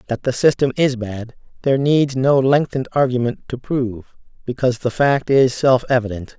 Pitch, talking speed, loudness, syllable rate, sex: 125 Hz, 170 wpm, -18 LUFS, 5.3 syllables/s, male